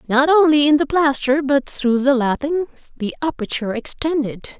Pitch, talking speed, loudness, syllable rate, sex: 275 Hz, 155 wpm, -18 LUFS, 5.1 syllables/s, female